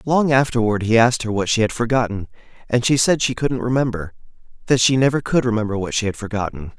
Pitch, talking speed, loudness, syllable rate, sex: 115 Hz, 205 wpm, -19 LUFS, 6.3 syllables/s, male